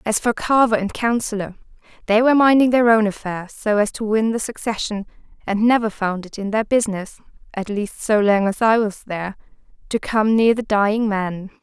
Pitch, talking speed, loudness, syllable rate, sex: 215 Hz, 195 wpm, -19 LUFS, 4.7 syllables/s, female